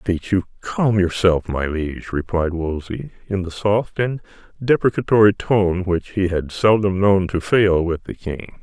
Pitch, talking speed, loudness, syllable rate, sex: 95 Hz, 165 wpm, -19 LUFS, 4.4 syllables/s, male